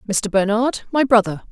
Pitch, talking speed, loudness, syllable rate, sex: 220 Hz, 120 wpm, -18 LUFS, 5.2 syllables/s, female